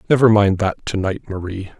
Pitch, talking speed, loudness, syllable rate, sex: 100 Hz, 200 wpm, -18 LUFS, 5.5 syllables/s, male